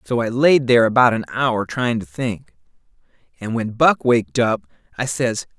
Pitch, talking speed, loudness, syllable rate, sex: 115 Hz, 185 wpm, -18 LUFS, 4.7 syllables/s, male